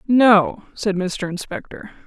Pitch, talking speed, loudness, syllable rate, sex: 200 Hz, 115 wpm, -19 LUFS, 3.5 syllables/s, female